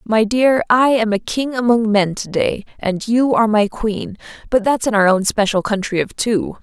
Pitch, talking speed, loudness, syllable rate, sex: 220 Hz, 215 wpm, -17 LUFS, 4.7 syllables/s, female